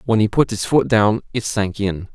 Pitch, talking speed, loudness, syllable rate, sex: 105 Hz, 250 wpm, -18 LUFS, 4.9 syllables/s, male